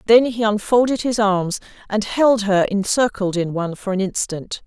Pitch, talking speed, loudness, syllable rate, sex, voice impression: 210 Hz, 180 wpm, -19 LUFS, 4.8 syllables/s, female, feminine, adult-like, tensed, powerful, clear, fluent, slightly raspy, intellectual, calm, elegant, lively, slightly sharp